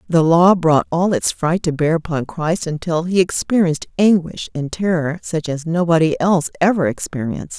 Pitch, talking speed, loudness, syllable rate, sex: 165 Hz, 175 wpm, -17 LUFS, 5.1 syllables/s, female